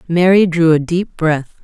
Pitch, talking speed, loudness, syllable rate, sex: 165 Hz, 185 wpm, -14 LUFS, 4.1 syllables/s, female